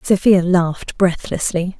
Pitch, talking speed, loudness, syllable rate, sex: 180 Hz, 100 wpm, -17 LUFS, 4.2 syllables/s, female